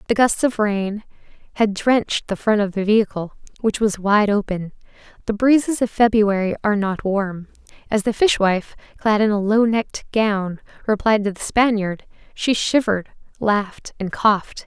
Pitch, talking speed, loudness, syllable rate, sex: 210 Hz, 165 wpm, -19 LUFS, 4.9 syllables/s, female